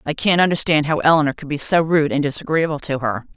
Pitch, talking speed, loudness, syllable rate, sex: 150 Hz, 230 wpm, -18 LUFS, 6.3 syllables/s, female